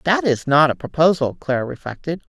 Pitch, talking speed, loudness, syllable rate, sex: 150 Hz, 180 wpm, -19 LUFS, 5.7 syllables/s, female